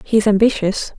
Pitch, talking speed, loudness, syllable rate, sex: 210 Hz, 185 wpm, -16 LUFS, 5.8 syllables/s, female